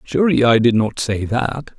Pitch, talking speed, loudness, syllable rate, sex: 120 Hz, 200 wpm, -17 LUFS, 4.8 syllables/s, male